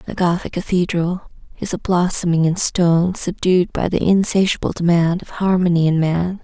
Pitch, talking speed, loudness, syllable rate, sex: 175 Hz, 160 wpm, -18 LUFS, 5.0 syllables/s, female